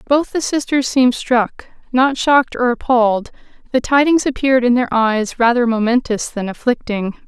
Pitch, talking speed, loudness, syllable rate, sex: 245 Hz, 155 wpm, -16 LUFS, 5.0 syllables/s, female